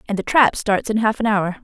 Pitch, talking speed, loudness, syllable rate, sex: 210 Hz, 295 wpm, -18 LUFS, 5.4 syllables/s, female